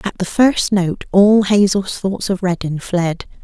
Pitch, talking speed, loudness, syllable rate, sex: 190 Hz, 175 wpm, -16 LUFS, 3.8 syllables/s, female